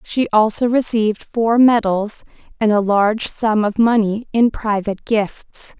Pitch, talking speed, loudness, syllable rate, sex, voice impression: 215 Hz, 145 wpm, -17 LUFS, 4.2 syllables/s, female, feminine, slightly adult-like, slightly halting, cute, slightly calm, friendly, slightly kind